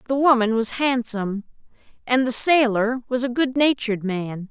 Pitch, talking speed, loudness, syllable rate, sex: 240 Hz, 145 wpm, -20 LUFS, 4.9 syllables/s, female